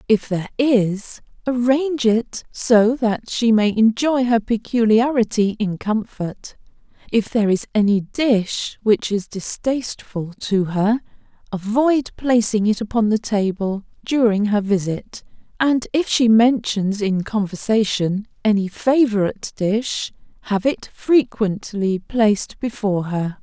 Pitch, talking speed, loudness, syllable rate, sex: 220 Hz, 125 wpm, -19 LUFS, 4.0 syllables/s, female